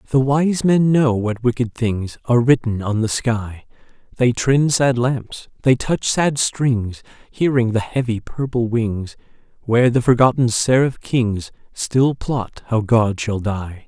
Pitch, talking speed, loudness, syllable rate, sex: 120 Hz, 155 wpm, -18 LUFS, 3.9 syllables/s, male